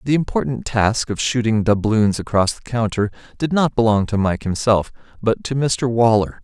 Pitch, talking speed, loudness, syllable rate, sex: 115 Hz, 175 wpm, -19 LUFS, 4.9 syllables/s, male